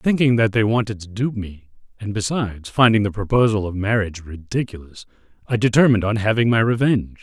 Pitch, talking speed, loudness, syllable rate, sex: 110 Hz, 175 wpm, -19 LUFS, 6.0 syllables/s, male